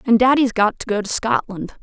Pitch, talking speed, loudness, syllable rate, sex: 220 Hz, 230 wpm, -18 LUFS, 5.6 syllables/s, female